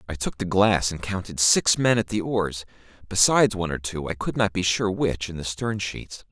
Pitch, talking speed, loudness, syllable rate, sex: 95 Hz, 240 wpm, -23 LUFS, 4.6 syllables/s, male